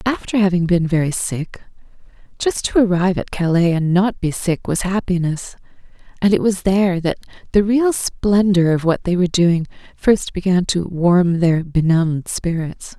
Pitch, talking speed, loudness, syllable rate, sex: 180 Hz, 170 wpm, -17 LUFS, 4.8 syllables/s, female